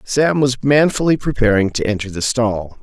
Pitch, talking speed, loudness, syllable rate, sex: 125 Hz, 170 wpm, -16 LUFS, 4.8 syllables/s, male